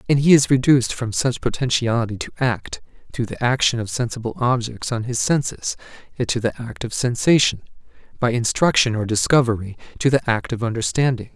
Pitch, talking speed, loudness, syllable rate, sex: 120 Hz, 160 wpm, -20 LUFS, 5.6 syllables/s, male